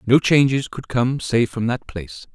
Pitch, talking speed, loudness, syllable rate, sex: 125 Hz, 205 wpm, -19 LUFS, 4.6 syllables/s, male